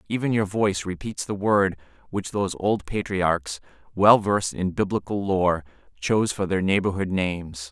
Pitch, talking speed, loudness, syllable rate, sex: 95 Hz, 155 wpm, -24 LUFS, 5.0 syllables/s, male